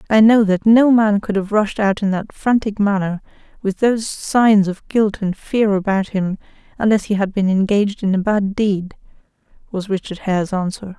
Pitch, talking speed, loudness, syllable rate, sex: 205 Hz, 190 wpm, -17 LUFS, 4.9 syllables/s, female